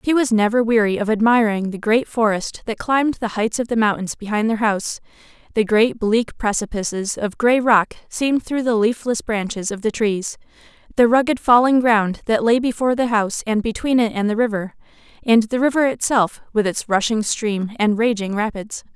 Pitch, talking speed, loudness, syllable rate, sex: 225 Hz, 190 wpm, -19 LUFS, 5.1 syllables/s, female